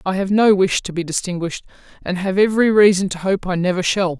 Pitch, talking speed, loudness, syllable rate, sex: 190 Hz, 230 wpm, -17 LUFS, 6.2 syllables/s, female